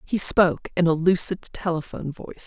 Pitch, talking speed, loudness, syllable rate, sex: 175 Hz, 170 wpm, -21 LUFS, 6.1 syllables/s, female